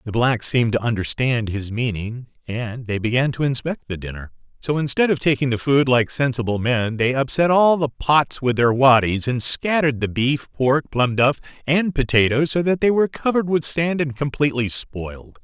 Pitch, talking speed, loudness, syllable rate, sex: 130 Hz, 195 wpm, -20 LUFS, 5.1 syllables/s, male